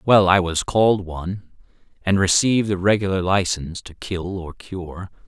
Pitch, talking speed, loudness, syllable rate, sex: 95 Hz, 160 wpm, -20 LUFS, 4.8 syllables/s, male